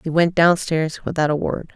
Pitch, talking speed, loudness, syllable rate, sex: 165 Hz, 240 wpm, -19 LUFS, 4.9 syllables/s, female